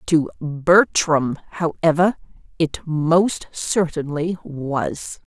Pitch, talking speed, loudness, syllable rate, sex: 165 Hz, 80 wpm, -20 LUFS, 2.8 syllables/s, female